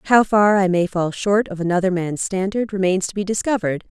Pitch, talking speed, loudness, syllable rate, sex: 190 Hz, 210 wpm, -19 LUFS, 5.5 syllables/s, female